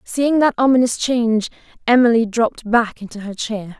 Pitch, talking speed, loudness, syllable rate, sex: 230 Hz, 160 wpm, -17 LUFS, 5.2 syllables/s, female